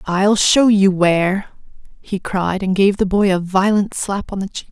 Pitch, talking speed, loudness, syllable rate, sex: 195 Hz, 205 wpm, -16 LUFS, 4.3 syllables/s, female